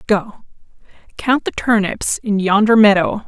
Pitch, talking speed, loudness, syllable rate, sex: 210 Hz, 130 wpm, -15 LUFS, 4.3 syllables/s, female